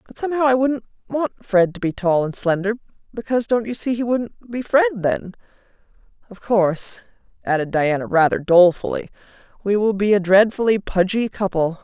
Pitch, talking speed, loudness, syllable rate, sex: 210 Hz, 165 wpm, -19 LUFS, 5.4 syllables/s, female